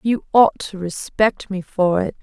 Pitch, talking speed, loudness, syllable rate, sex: 195 Hz, 190 wpm, -19 LUFS, 4.0 syllables/s, female